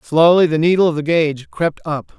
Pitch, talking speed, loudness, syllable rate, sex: 160 Hz, 220 wpm, -16 LUFS, 5.6 syllables/s, male